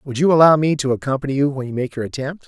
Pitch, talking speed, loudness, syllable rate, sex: 140 Hz, 290 wpm, -18 LUFS, 7.0 syllables/s, male